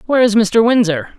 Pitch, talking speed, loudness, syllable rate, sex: 215 Hz, 205 wpm, -13 LUFS, 5.9 syllables/s, female